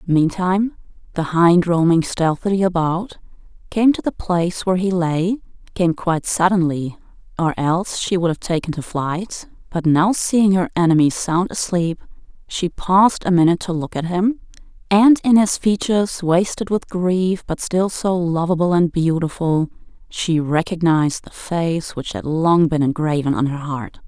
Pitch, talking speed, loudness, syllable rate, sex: 175 Hz, 155 wpm, -18 LUFS, 4.6 syllables/s, female